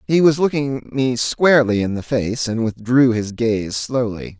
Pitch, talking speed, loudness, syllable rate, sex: 120 Hz, 175 wpm, -18 LUFS, 4.3 syllables/s, male